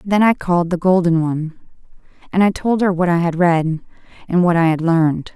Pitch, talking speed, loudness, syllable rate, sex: 175 Hz, 215 wpm, -16 LUFS, 5.7 syllables/s, female